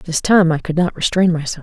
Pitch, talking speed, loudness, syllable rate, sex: 165 Hz, 260 wpm, -16 LUFS, 5.5 syllables/s, female